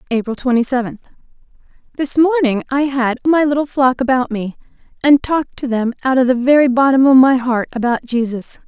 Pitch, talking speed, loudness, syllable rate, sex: 260 Hz, 175 wpm, -15 LUFS, 5.6 syllables/s, female